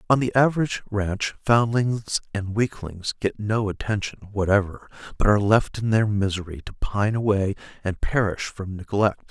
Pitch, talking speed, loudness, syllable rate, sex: 105 Hz, 155 wpm, -23 LUFS, 4.8 syllables/s, male